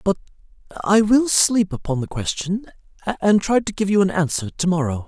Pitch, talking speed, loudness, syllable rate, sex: 185 Hz, 190 wpm, -20 LUFS, 5.4 syllables/s, male